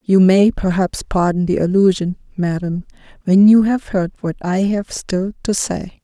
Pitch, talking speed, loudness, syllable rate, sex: 190 Hz, 170 wpm, -16 LUFS, 4.3 syllables/s, female